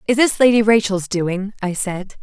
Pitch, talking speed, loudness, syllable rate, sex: 205 Hz, 190 wpm, -17 LUFS, 4.6 syllables/s, female